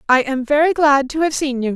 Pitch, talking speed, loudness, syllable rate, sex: 280 Hz, 275 wpm, -16 LUFS, 5.6 syllables/s, female